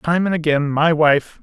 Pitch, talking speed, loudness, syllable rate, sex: 155 Hz, 210 wpm, -17 LUFS, 5.7 syllables/s, male